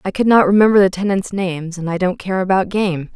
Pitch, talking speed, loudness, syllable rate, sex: 190 Hz, 250 wpm, -16 LUFS, 5.9 syllables/s, female